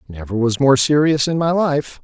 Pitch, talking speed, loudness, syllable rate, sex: 140 Hz, 205 wpm, -16 LUFS, 4.8 syllables/s, male